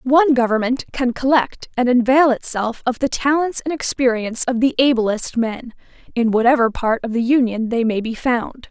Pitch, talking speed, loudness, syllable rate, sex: 245 Hz, 180 wpm, -18 LUFS, 5.0 syllables/s, female